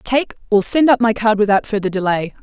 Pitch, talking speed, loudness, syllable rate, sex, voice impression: 215 Hz, 225 wpm, -16 LUFS, 5.5 syllables/s, female, very feminine, slightly young, adult-like, very thin, slightly relaxed, weak, soft, slightly muffled, fluent, slightly raspy, cute, very intellectual, slightly refreshing, very sincere, very calm, friendly, very reassuring, very unique, very elegant, slightly wild, sweet, very kind, slightly modest